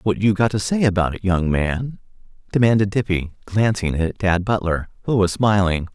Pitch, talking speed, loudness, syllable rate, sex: 100 Hz, 180 wpm, -20 LUFS, 5.0 syllables/s, male